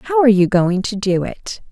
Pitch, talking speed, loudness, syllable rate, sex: 215 Hz, 245 wpm, -16 LUFS, 5.0 syllables/s, female